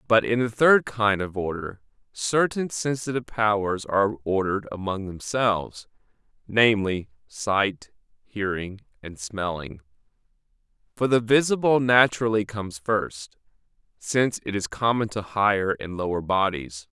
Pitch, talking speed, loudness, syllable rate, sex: 105 Hz, 120 wpm, -24 LUFS, 4.6 syllables/s, male